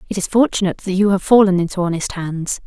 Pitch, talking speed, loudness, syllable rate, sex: 190 Hz, 225 wpm, -17 LUFS, 6.6 syllables/s, female